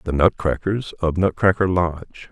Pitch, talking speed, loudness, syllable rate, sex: 90 Hz, 130 wpm, -20 LUFS, 4.6 syllables/s, male